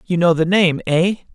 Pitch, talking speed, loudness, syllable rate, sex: 175 Hz, 225 wpm, -16 LUFS, 5.0 syllables/s, male